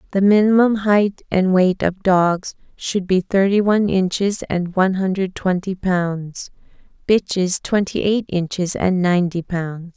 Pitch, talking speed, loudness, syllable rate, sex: 190 Hz, 145 wpm, -18 LUFS, 4.2 syllables/s, female